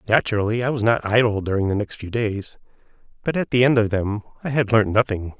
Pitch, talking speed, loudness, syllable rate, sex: 110 Hz, 220 wpm, -21 LUFS, 6.0 syllables/s, male